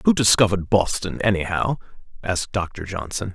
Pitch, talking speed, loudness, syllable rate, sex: 100 Hz, 125 wpm, -22 LUFS, 5.8 syllables/s, male